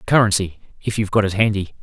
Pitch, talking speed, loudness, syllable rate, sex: 100 Hz, 195 wpm, -19 LUFS, 6.9 syllables/s, male